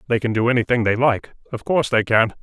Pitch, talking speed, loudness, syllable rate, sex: 115 Hz, 250 wpm, -19 LUFS, 6.6 syllables/s, male